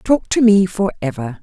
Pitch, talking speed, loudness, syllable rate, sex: 190 Hz, 210 wpm, -16 LUFS, 4.6 syllables/s, female